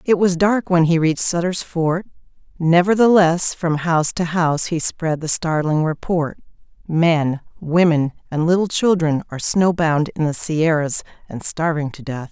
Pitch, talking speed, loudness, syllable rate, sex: 165 Hz, 160 wpm, -18 LUFS, 4.6 syllables/s, female